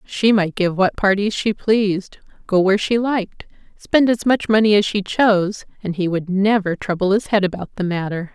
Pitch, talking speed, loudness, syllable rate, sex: 200 Hz, 200 wpm, -18 LUFS, 5.1 syllables/s, female